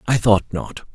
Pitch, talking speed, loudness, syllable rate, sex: 105 Hz, 190 wpm, -19 LUFS, 4.3 syllables/s, male